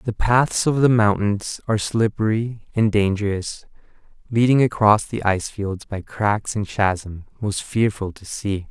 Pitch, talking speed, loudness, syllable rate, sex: 105 Hz, 150 wpm, -20 LUFS, 4.3 syllables/s, male